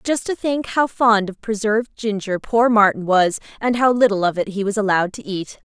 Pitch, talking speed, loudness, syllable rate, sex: 215 Hz, 220 wpm, -19 LUFS, 5.3 syllables/s, female